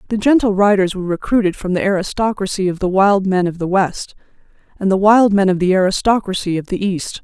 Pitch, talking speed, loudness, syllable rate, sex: 195 Hz, 205 wpm, -16 LUFS, 5.9 syllables/s, female